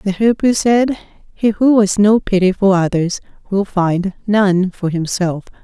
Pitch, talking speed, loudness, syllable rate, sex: 195 Hz, 160 wpm, -15 LUFS, 4.1 syllables/s, female